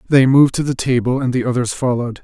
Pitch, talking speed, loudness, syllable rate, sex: 125 Hz, 240 wpm, -16 LUFS, 6.8 syllables/s, male